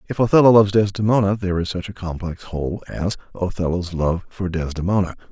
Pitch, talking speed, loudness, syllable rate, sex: 95 Hz, 170 wpm, -20 LUFS, 6.2 syllables/s, male